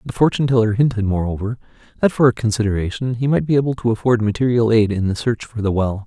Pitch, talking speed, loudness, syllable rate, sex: 110 Hz, 230 wpm, -18 LUFS, 6.7 syllables/s, male